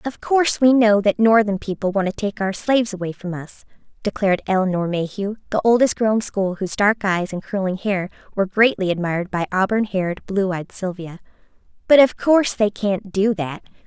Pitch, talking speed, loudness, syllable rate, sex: 200 Hz, 195 wpm, -19 LUFS, 5.5 syllables/s, female